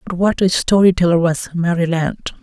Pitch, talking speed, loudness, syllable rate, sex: 175 Hz, 200 wpm, -16 LUFS, 4.9 syllables/s, male